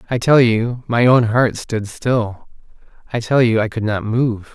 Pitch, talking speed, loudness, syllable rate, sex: 115 Hz, 200 wpm, -17 LUFS, 4.1 syllables/s, male